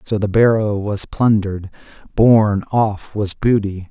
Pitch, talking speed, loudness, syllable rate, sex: 105 Hz, 140 wpm, -16 LUFS, 4.2 syllables/s, male